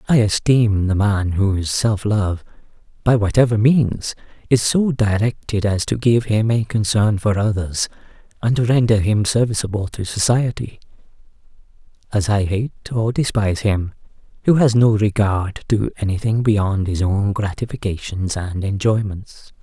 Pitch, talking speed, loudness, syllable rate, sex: 105 Hz, 140 wpm, -18 LUFS, 4.4 syllables/s, male